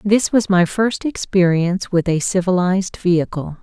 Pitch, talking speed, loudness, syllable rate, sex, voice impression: 185 Hz, 150 wpm, -17 LUFS, 4.8 syllables/s, female, feminine, middle-aged, slightly thick, tensed, powerful, slightly hard, clear, slightly fluent, intellectual, slightly calm, elegant, lively, sharp